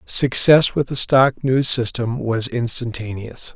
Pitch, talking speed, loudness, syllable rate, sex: 125 Hz, 135 wpm, -18 LUFS, 3.8 syllables/s, male